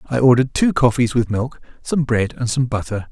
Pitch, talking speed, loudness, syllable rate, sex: 125 Hz, 210 wpm, -18 LUFS, 5.5 syllables/s, male